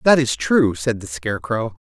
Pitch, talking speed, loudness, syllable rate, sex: 115 Hz, 195 wpm, -20 LUFS, 4.7 syllables/s, male